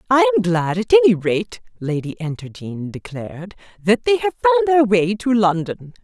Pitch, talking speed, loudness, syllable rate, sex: 195 Hz, 170 wpm, -18 LUFS, 5.0 syllables/s, female